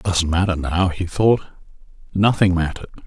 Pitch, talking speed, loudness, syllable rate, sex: 90 Hz, 155 wpm, -19 LUFS, 5.2 syllables/s, male